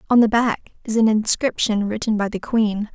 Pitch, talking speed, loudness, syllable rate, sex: 220 Hz, 205 wpm, -20 LUFS, 4.9 syllables/s, female